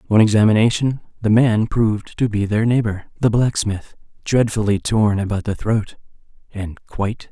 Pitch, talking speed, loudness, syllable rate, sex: 110 Hz, 155 wpm, -18 LUFS, 5.0 syllables/s, male